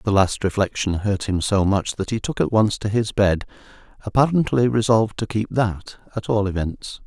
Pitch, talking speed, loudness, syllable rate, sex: 105 Hz, 195 wpm, -21 LUFS, 4.9 syllables/s, male